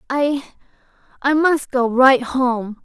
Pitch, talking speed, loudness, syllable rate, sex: 265 Hz, 85 wpm, -17 LUFS, 3.3 syllables/s, female